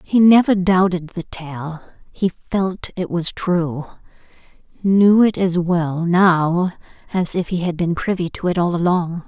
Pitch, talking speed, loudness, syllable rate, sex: 180 Hz, 160 wpm, -18 LUFS, 3.9 syllables/s, female